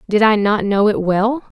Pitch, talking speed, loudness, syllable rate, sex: 210 Hz, 225 wpm, -16 LUFS, 4.7 syllables/s, female